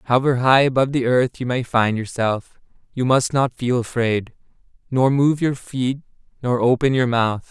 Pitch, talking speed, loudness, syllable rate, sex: 125 Hz, 175 wpm, -19 LUFS, 4.8 syllables/s, male